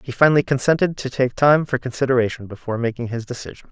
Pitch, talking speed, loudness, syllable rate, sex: 130 Hz, 195 wpm, -19 LUFS, 6.9 syllables/s, male